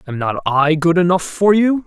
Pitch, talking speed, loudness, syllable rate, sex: 170 Hz, 225 wpm, -15 LUFS, 4.7 syllables/s, male